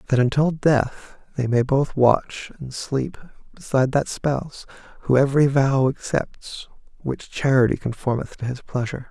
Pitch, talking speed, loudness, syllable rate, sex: 135 Hz, 145 wpm, -22 LUFS, 4.6 syllables/s, male